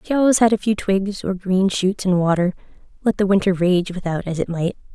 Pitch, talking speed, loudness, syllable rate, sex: 190 Hz, 220 wpm, -19 LUFS, 5.5 syllables/s, female